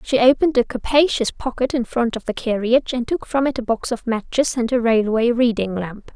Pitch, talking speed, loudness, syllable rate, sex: 240 Hz, 225 wpm, -19 LUFS, 5.5 syllables/s, female